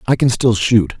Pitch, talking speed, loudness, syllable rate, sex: 115 Hz, 240 wpm, -15 LUFS, 4.6 syllables/s, male